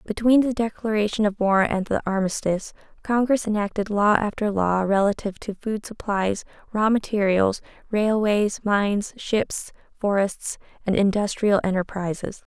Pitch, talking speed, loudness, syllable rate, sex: 205 Hz, 125 wpm, -23 LUFS, 4.7 syllables/s, female